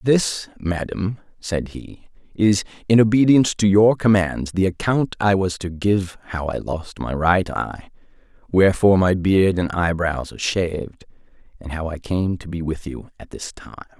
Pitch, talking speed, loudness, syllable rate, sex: 95 Hz, 175 wpm, -20 LUFS, 4.6 syllables/s, male